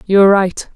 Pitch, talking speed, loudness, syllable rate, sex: 195 Hz, 235 wpm, -12 LUFS, 6.8 syllables/s, female